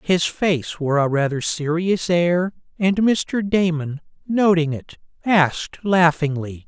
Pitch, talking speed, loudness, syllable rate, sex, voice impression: 170 Hz, 125 wpm, -20 LUFS, 3.6 syllables/s, male, masculine, adult-like, slightly tensed, powerful, bright, raspy, slightly intellectual, friendly, unique, lively, slightly intense, light